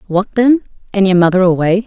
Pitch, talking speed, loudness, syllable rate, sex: 195 Hz, 195 wpm, -13 LUFS, 5.8 syllables/s, female